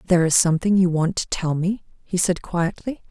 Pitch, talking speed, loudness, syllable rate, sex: 180 Hz, 215 wpm, -21 LUFS, 5.6 syllables/s, female